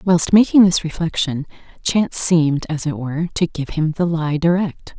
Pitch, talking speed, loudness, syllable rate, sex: 165 Hz, 180 wpm, -18 LUFS, 5.0 syllables/s, female